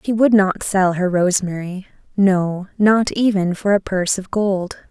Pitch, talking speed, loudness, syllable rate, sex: 195 Hz, 170 wpm, -18 LUFS, 4.3 syllables/s, female